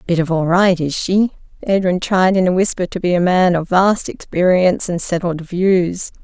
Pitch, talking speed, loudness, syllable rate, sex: 180 Hz, 200 wpm, -16 LUFS, 4.8 syllables/s, female